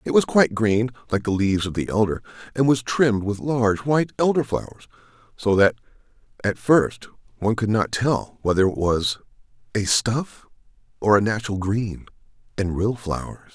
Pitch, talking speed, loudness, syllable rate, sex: 115 Hz, 170 wpm, -22 LUFS, 5.4 syllables/s, male